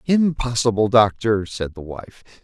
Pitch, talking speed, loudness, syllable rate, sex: 110 Hz, 125 wpm, -19 LUFS, 4.2 syllables/s, male